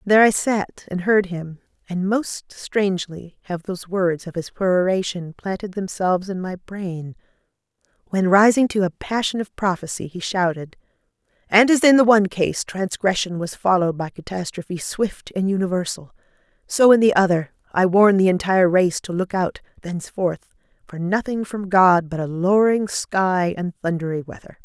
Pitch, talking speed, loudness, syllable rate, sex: 190 Hz, 165 wpm, -20 LUFS, 5.0 syllables/s, female